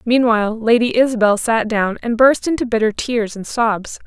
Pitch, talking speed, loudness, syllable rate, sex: 230 Hz, 175 wpm, -16 LUFS, 4.9 syllables/s, female